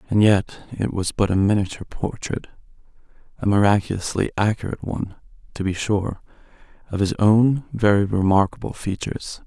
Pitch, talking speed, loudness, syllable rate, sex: 100 Hz, 120 wpm, -21 LUFS, 5.6 syllables/s, male